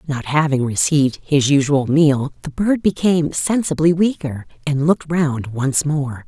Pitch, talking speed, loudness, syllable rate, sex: 150 Hz, 155 wpm, -18 LUFS, 4.5 syllables/s, female